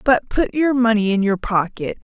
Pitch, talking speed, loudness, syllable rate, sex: 225 Hz, 200 wpm, -18 LUFS, 4.7 syllables/s, female